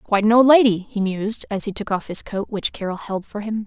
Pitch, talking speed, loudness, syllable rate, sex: 210 Hz, 280 wpm, -20 LUFS, 5.8 syllables/s, female